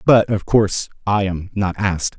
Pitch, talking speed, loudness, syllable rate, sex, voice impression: 100 Hz, 195 wpm, -18 LUFS, 4.8 syllables/s, male, very masculine, very middle-aged, very thick, very tensed, very powerful, very bright, soft, very clear, very fluent, slightly raspy, very cool, intellectual, slightly refreshing, sincere, very calm, mature, friendly, very reassuring, slightly elegant, very wild, sweet, very lively, kind, intense